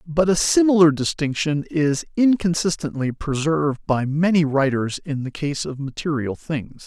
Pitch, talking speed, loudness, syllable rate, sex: 155 Hz, 140 wpm, -21 LUFS, 4.6 syllables/s, male